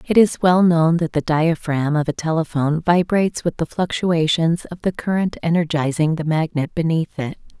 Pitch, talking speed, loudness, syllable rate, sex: 165 Hz, 175 wpm, -19 LUFS, 5.0 syllables/s, female